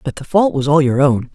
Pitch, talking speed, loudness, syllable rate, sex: 150 Hz, 315 wpm, -15 LUFS, 5.7 syllables/s, female